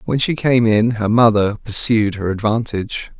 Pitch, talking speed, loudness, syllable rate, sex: 110 Hz, 170 wpm, -16 LUFS, 4.7 syllables/s, male